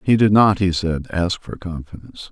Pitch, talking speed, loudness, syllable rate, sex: 90 Hz, 205 wpm, -18 LUFS, 5.0 syllables/s, male